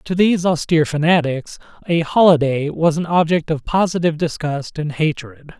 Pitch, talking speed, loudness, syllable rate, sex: 160 Hz, 150 wpm, -17 LUFS, 5.2 syllables/s, male